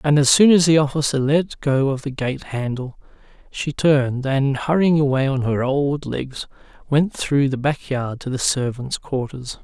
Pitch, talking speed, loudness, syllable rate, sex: 140 Hz, 185 wpm, -19 LUFS, 4.4 syllables/s, male